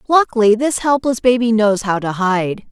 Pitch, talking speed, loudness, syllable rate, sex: 225 Hz, 175 wpm, -15 LUFS, 4.8 syllables/s, female